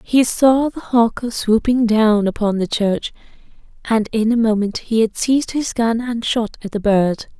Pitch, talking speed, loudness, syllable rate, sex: 225 Hz, 185 wpm, -17 LUFS, 4.3 syllables/s, female